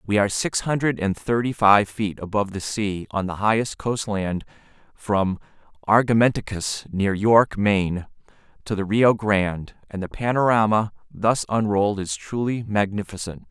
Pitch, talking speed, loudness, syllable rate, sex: 105 Hz, 140 wpm, -22 LUFS, 4.8 syllables/s, male